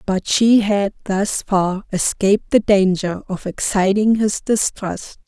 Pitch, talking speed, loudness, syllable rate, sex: 200 Hz, 135 wpm, -18 LUFS, 3.7 syllables/s, female